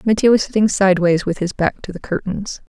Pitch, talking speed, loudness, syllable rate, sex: 190 Hz, 220 wpm, -17 LUFS, 5.9 syllables/s, female